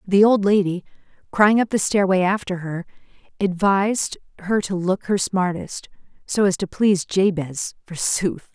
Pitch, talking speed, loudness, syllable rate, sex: 190 Hz, 140 wpm, -20 LUFS, 4.5 syllables/s, female